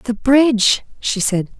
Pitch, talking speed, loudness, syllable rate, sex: 230 Hz, 150 wpm, -16 LUFS, 4.1 syllables/s, female